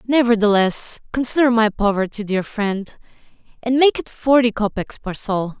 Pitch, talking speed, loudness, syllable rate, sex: 220 Hz, 140 wpm, -18 LUFS, 4.7 syllables/s, female